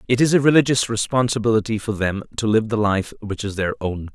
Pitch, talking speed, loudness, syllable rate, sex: 110 Hz, 215 wpm, -20 LUFS, 6.0 syllables/s, male